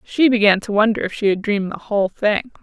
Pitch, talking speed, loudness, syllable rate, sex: 210 Hz, 250 wpm, -18 LUFS, 6.2 syllables/s, female